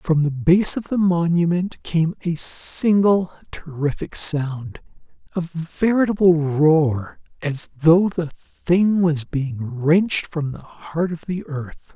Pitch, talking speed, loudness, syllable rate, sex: 165 Hz, 135 wpm, -20 LUFS, 3.4 syllables/s, male